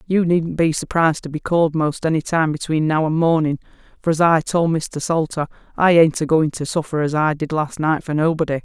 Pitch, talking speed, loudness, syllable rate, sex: 160 Hz, 230 wpm, -19 LUFS, 5.3 syllables/s, female